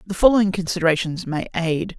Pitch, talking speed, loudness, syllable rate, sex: 175 Hz, 150 wpm, -20 LUFS, 6.2 syllables/s, male